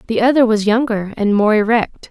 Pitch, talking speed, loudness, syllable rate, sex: 220 Hz, 200 wpm, -15 LUFS, 5.3 syllables/s, female